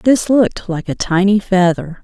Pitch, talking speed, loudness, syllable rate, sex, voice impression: 195 Hz, 175 wpm, -15 LUFS, 4.6 syllables/s, female, very feminine, adult-like, slightly middle-aged, slightly thin, slightly tensed, slightly weak, slightly bright, slightly soft, clear, slightly fluent, cute, very intellectual, refreshing, sincere, very calm, very friendly, reassuring, elegant, sweet, slightly lively, slightly kind